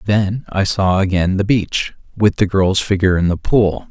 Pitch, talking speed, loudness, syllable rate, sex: 100 Hz, 200 wpm, -16 LUFS, 4.6 syllables/s, male